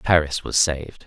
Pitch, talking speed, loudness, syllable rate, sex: 80 Hz, 170 wpm, -21 LUFS, 5.2 syllables/s, male